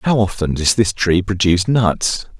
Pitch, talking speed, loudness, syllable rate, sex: 100 Hz, 175 wpm, -16 LUFS, 4.6 syllables/s, male